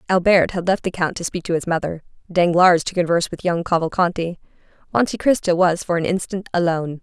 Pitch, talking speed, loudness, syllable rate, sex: 175 Hz, 195 wpm, -19 LUFS, 6.0 syllables/s, female